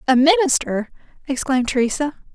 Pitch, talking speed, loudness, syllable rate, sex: 275 Hz, 100 wpm, -19 LUFS, 6.0 syllables/s, female